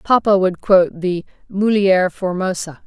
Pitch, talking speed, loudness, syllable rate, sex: 185 Hz, 125 wpm, -17 LUFS, 4.4 syllables/s, female